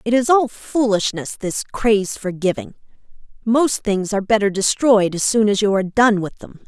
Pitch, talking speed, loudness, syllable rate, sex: 215 Hz, 190 wpm, -18 LUFS, 5.0 syllables/s, female